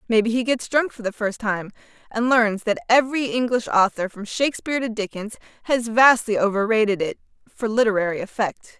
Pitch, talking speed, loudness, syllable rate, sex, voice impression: 225 Hz, 170 wpm, -21 LUFS, 5.7 syllables/s, female, very feminine, adult-like, slightly middle-aged, thin, very tensed, powerful, bright, very hard, very clear, fluent, slightly raspy, slightly cute, cool, intellectual, refreshing, slightly sincere, slightly calm, slightly friendly, slightly reassuring, very unique, slightly elegant, slightly wild, slightly sweet, slightly lively, strict, slightly intense, sharp